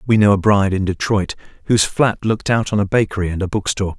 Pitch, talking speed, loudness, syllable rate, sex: 100 Hz, 240 wpm, -17 LUFS, 6.8 syllables/s, male